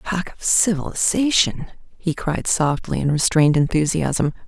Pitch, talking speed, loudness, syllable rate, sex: 165 Hz, 120 wpm, -19 LUFS, 4.4 syllables/s, female